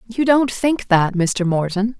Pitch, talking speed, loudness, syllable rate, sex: 210 Hz, 180 wpm, -18 LUFS, 3.9 syllables/s, female